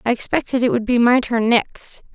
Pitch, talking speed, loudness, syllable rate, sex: 240 Hz, 225 wpm, -17 LUFS, 5.1 syllables/s, female